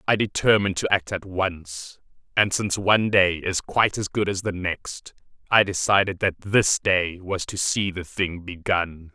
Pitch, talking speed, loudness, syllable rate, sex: 95 Hz, 185 wpm, -22 LUFS, 4.5 syllables/s, male